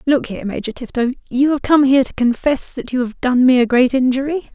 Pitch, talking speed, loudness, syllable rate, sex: 260 Hz, 240 wpm, -16 LUFS, 5.9 syllables/s, female